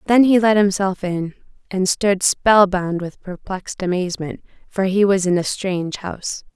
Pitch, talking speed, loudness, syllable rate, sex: 190 Hz, 155 wpm, -19 LUFS, 4.8 syllables/s, female